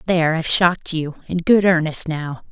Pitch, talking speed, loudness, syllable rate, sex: 165 Hz, 190 wpm, -18 LUFS, 5.4 syllables/s, female